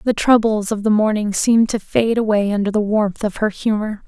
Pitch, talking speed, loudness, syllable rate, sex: 215 Hz, 220 wpm, -17 LUFS, 5.3 syllables/s, female